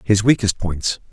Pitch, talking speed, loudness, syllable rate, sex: 100 Hz, 160 wpm, -18 LUFS, 4.3 syllables/s, male